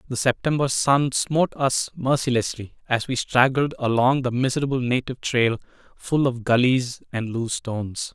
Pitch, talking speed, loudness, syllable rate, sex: 125 Hz, 145 wpm, -22 LUFS, 5.0 syllables/s, male